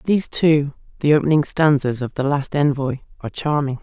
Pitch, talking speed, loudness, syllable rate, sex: 145 Hz, 175 wpm, -19 LUFS, 5.3 syllables/s, female